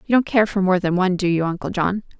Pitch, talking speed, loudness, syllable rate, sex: 190 Hz, 300 wpm, -20 LUFS, 6.6 syllables/s, female